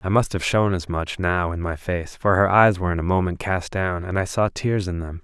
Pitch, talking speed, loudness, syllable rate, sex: 90 Hz, 285 wpm, -22 LUFS, 5.3 syllables/s, male